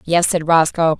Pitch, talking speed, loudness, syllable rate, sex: 165 Hz, 180 wpm, -15 LUFS, 4.5 syllables/s, female